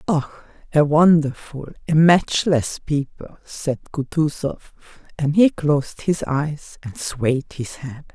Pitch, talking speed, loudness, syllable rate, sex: 150 Hz, 125 wpm, -20 LUFS, 3.7 syllables/s, female